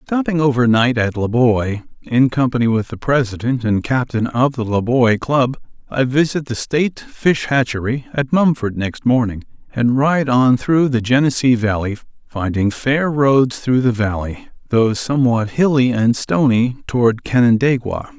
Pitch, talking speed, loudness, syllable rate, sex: 125 Hz, 150 wpm, -17 LUFS, 4.4 syllables/s, male